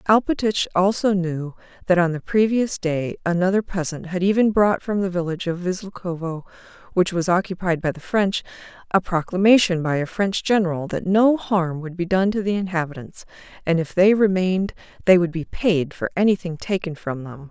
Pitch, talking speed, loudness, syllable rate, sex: 180 Hz, 180 wpm, -21 LUFS, 5.3 syllables/s, female